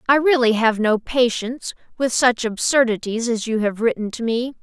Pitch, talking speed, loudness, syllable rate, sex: 235 Hz, 180 wpm, -19 LUFS, 5.0 syllables/s, female